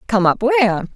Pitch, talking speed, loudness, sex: 225 Hz, 190 wpm, -16 LUFS, female